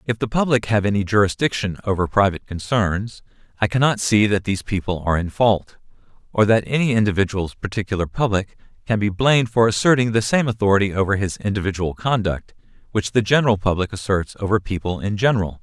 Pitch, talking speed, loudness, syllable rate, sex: 105 Hz, 175 wpm, -20 LUFS, 6.1 syllables/s, male